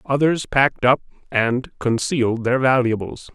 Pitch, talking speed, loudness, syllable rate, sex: 125 Hz, 125 wpm, -19 LUFS, 4.4 syllables/s, male